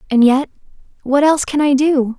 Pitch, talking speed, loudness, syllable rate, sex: 275 Hz, 190 wpm, -14 LUFS, 5.6 syllables/s, female